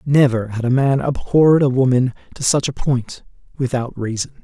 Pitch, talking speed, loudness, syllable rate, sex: 130 Hz, 175 wpm, -18 LUFS, 5.1 syllables/s, male